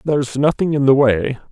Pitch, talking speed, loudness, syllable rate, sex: 135 Hz, 200 wpm, -16 LUFS, 5.3 syllables/s, male